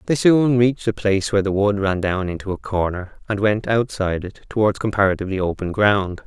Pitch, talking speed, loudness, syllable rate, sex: 100 Hz, 200 wpm, -20 LUFS, 6.0 syllables/s, male